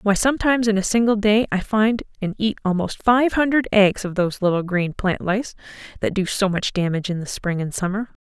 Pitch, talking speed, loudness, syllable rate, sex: 205 Hz, 220 wpm, -20 LUFS, 5.6 syllables/s, female